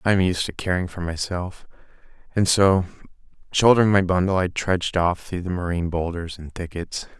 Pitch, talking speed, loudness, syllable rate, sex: 90 Hz, 175 wpm, -22 LUFS, 5.5 syllables/s, male